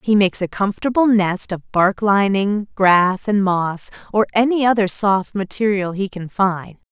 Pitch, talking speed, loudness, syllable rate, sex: 200 Hz, 165 wpm, -18 LUFS, 4.4 syllables/s, female